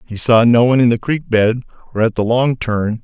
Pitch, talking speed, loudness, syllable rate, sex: 115 Hz, 255 wpm, -14 LUFS, 5.5 syllables/s, male